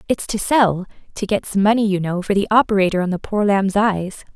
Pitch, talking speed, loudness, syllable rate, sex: 200 Hz, 220 wpm, -18 LUFS, 5.5 syllables/s, female